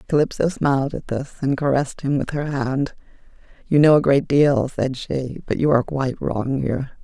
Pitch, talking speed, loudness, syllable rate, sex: 135 Hz, 195 wpm, -20 LUFS, 5.5 syllables/s, female